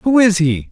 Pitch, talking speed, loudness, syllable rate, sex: 200 Hz, 255 wpm, -14 LUFS, 4.5 syllables/s, male